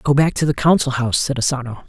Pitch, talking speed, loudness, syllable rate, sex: 135 Hz, 255 wpm, -18 LUFS, 6.8 syllables/s, male